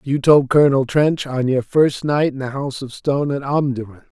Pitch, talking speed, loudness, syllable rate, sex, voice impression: 135 Hz, 215 wpm, -18 LUFS, 5.4 syllables/s, male, masculine, adult-like, slightly middle-aged, slightly thick, slightly relaxed, slightly weak, slightly dark, soft, slightly muffled, cool, intellectual, slightly refreshing, slightly sincere, calm, mature, friendly, slightly reassuring, unique, elegant, sweet, slightly lively, kind, modest